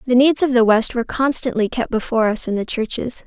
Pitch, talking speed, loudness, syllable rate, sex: 240 Hz, 240 wpm, -18 LUFS, 6.0 syllables/s, female